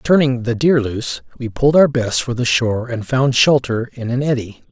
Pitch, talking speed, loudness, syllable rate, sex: 125 Hz, 215 wpm, -17 LUFS, 5.2 syllables/s, male